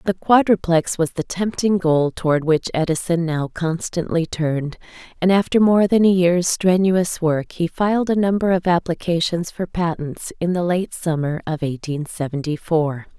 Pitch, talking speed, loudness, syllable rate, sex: 170 Hz, 165 wpm, -19 LUFS, 4.6 syllables/s, female